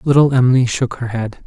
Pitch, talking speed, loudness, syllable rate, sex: 125 Hz, 205 wpm, -15 LUFS, 5.1 syllables/s, male